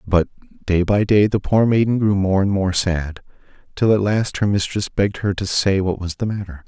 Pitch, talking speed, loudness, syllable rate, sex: 100 Hz, 225 wpm, -19 LUFS, 5.2 syllables/s, male